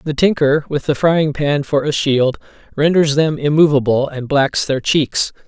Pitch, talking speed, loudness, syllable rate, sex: 145 Hz, 175 wpm, -15 LUFS, 4.4 syllables/s, male